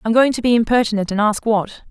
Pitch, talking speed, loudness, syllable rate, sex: 220 Hz, 250 wpm, -17 LUFS, 6.3 syllables/s, female